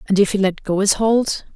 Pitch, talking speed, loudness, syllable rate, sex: 200 Hz, 270 wpm, -18 LUFS, 5.3 syllables/s, female